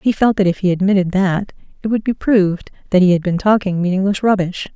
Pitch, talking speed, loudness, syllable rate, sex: 190 Hz, 225 wpm, -16 LUFS, 6.0 syllables/s, female